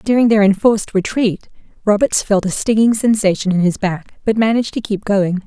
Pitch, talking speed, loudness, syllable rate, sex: 210 Hz, 185 wpm, -16 LUFS, 5.6 syllables/s, female